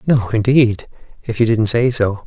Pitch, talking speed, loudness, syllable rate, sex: 115 Hz, 185 wpm, -15 LUFS, 4.6 syllables/s, male